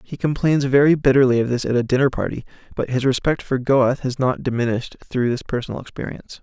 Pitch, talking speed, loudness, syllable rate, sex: 130 Hz, 205 wpm, -20 LUFS, 6.5 syllables/s, male